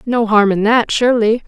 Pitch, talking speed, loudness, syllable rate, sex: 225 Hz, 205 wpm, -13 LUFS, 5.2 syllables/s, female